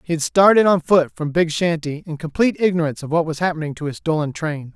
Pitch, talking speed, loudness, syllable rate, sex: 165 Hz, 240 wpm, -19 LUFS, 6.3 syllables/s, male